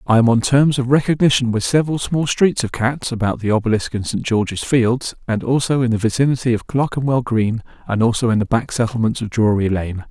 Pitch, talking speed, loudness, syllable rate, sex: 120 Hz, 215 wpm, -18 LUFS, 5.8 syllables/s, male